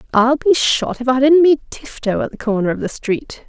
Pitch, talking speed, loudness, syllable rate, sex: 255 Hz, 240 wpm, -16 LUFS, 5.0 syllables/s, female